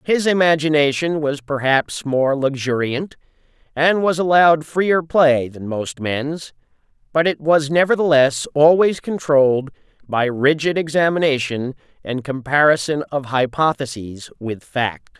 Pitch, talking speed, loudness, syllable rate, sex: 145 Hz, 115 wpm, -18 LUFS, 4.2 syllables/s, male